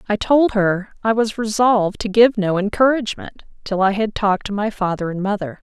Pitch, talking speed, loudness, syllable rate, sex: 205 Hz, 200 wpm, -18 LUFS, 5.5 syllables/s, female